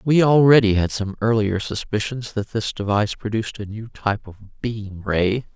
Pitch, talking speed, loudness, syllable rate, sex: 110 Hz, 175 wpm, -21 LUFS, 5.2 syllables/s, female